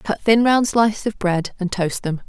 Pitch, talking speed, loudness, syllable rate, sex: 205 Hz, 235 wpm, -19 LUFS, 4.6 syllables/s, female